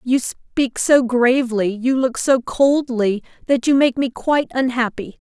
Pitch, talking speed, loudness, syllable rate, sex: 250 Hz, 160 wpm, -18 LUFS, 4.2 syllables/s, female